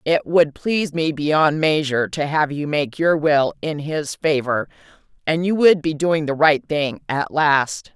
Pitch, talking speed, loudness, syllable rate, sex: 150 Hz, 190 wpm, -19 LUFS, 4.1 syllables/s, female